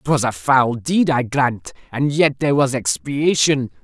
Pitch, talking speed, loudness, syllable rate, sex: 130 Hz, 170 wpm, -18 LUFS, 4.1 syllables/s, male